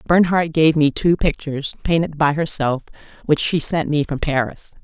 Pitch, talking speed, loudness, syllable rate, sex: 155 Hz, 175 wpm, -18 LUFS, 5.0 syllables/s, female